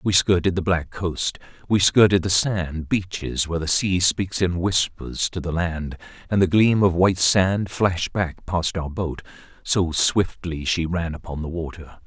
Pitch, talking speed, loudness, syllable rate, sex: 90 Hz, 185 wpm, -22 LUFS, 4.3 syllables/s, male